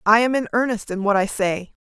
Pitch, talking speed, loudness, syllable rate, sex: 215 Hz, 265 wpm, -20 LUFS, 5.6 syllables/s, female